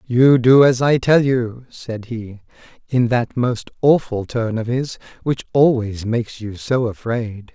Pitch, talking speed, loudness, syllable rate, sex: 120 Hz, 165 wpm, -18 LUFS, 3.9 syllables/s, male